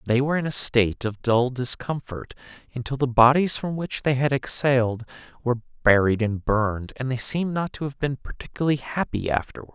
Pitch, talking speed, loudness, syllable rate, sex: 130 Hz, 185 wpm, -23 LUFS, 5.6 syllables/s, male